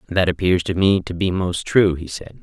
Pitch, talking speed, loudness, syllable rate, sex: 90 Hz, 245 wpm, -19 LUFS, 4.9 syllables/s, male